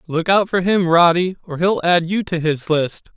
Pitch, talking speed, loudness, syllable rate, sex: 175 Hz, 230 wpm, -17 LUFS, 4.5 syllables/s, male